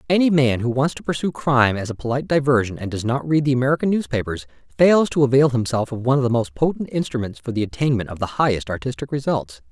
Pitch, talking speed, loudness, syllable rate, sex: 130 Hz, 230 wpm, -20 LUFS, 6.7 syllables/s, male